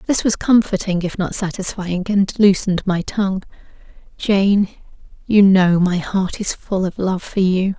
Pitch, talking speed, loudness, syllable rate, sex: 190 Hz, 160 wpm, -18 LUFS, 4.5 syllables/s, female